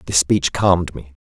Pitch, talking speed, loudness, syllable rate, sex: 85 Hz, 195 wpm, -17 LUFS, 5.1 syllables/s, male